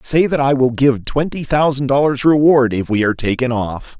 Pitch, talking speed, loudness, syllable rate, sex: 135 Hz, 210 wpm, -15 LUFS, 5.1 syllables/s, male